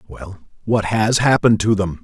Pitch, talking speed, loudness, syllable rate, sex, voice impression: 105 Hz, 175 wpm, -17 LUFS, 5.0 syllables/s, male, masculine, middle-aged, thick, tensed, powerful, clear, cool, intellectual, calm, friendly, reassuring, wild, lively, slightly strict